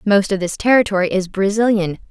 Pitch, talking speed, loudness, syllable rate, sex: 200 Hz, 170 wpm, -17 LUFS, 5.8 syllables/s, female